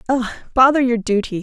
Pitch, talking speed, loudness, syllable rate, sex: 240 Hz, 170 wpm, -17 LUFS, 5.7 syllables/s, female